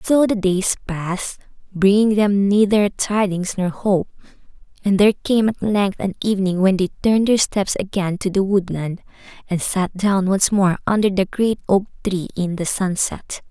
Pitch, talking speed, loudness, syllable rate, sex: 195 Hz, 175 wpm, -19 LUFS, 4.7 syllables/s, female